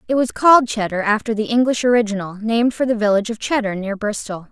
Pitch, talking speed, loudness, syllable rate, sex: 220 Hz, 210 wpm, -18 LUFS, 6.5 syllables/s, female